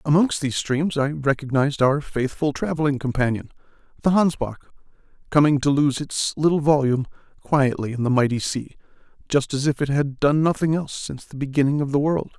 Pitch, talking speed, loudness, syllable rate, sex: 140 Hz, 175 wpm, -22 LUFS, 5.8 syllables/s, male